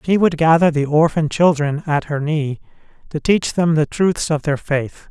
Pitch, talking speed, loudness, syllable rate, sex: 155 Hz, 200 wpm, -17 LUFS, 4.5 syllables/s, male